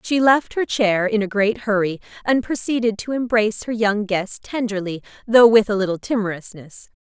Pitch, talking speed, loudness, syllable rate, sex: 215 Hz, 180 wpm, -19 LUFS, 5.1 syllables/s, female